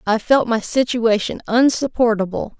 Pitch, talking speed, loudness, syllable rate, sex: 230 Hz, 115 wpm, -18 LUFS, 4.7 syllables/s, female